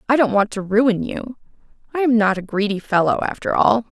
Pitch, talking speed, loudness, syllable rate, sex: 220 Hz, 210 wpm, -19 LUFS, 5.5 syllables/s, female